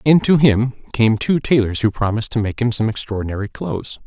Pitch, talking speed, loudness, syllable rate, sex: 115 Hz, 205 wpm, -18 LUFS, 5.9 syllables/s, male